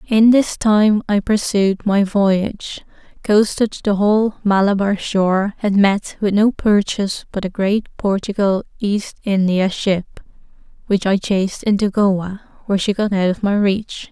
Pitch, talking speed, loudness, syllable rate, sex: 200 Hz, 155 wpm, -17 LUFS, 4.2 syllables/s, female